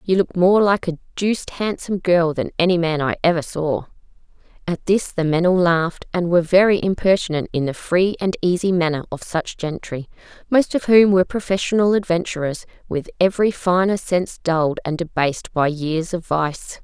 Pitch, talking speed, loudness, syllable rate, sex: 175 Hz, 180 wpm, -19 LUFS, 5.4 syllables/s, female